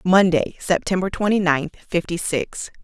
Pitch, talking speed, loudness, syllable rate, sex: 175 Hz, 125 wpm, -21 LUFS, 4.6 syllables/s, female